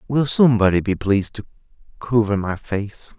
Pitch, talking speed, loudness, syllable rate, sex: 110 Hz, 150 wpm, -19 LUFS, 4.9 syllables/s, male